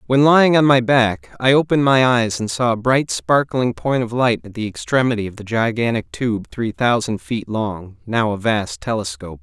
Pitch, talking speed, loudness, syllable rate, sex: 115 Hz, 205 wpm, -18 LUFS, 4.9 syllables/s, male